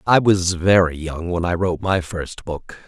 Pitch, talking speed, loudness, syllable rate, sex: 90 Hz, 210 wpm, -20 LUFS, 4.4 syllables/s, male